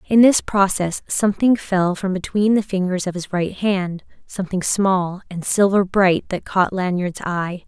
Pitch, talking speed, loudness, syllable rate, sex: 190 Hz, 165 wpm, -19 LUFS, 4.3 syllables/s, female